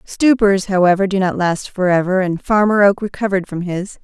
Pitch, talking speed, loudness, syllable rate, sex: 190 Hz, 195 wpm, -16 LUFS, 5.4 syllables/s, female